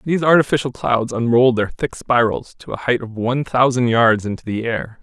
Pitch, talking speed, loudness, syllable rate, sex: 120 Hz, 205 wpm, -18 LUFS, 5.5 syllables/s, male